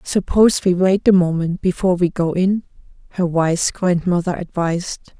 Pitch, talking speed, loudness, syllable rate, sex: 180 Hz, 150 wpm, -18 LUFS, 5.1 syllables/s, female